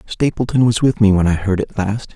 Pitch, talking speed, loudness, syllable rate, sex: 110 Hz, 250 wpm, -16 LUFS, 5.5 syllables/s, male